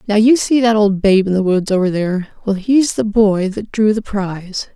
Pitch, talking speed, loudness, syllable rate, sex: 205 Hz, 240 wpm, -15 LUFS, 5.0 syllables/s, female